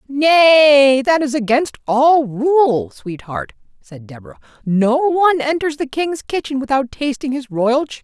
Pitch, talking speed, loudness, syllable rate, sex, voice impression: 260 Hz, 150 wpm, -15 LUFS, 4.0 syllables/s, male, masculine, adult-like, slightly middle-aged, slightly thick, slightly tensed, slightly powerful, very bright, hard, clear, very fluent, slightly raspy, slightly cool, very intellectual, very refreshing, very sincere, slightly calm, slightly mature, friendly, slightly reassuring, very unique, elegant, sweet, kind, slightly sharp, light